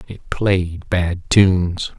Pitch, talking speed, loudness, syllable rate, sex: 90 Hz, 120 wpm, -18 LUFS, 3.0 syllables/s, male